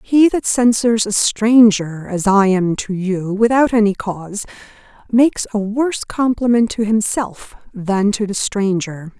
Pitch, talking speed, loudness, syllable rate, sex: 210 Hz, 150 wpm, -16 LUFS, 4.3 syllables/s, female